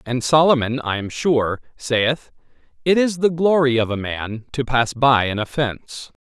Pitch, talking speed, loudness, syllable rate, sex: 130 Hz, 175 wpm, -19 LUFS, 4.3 syllables/s, male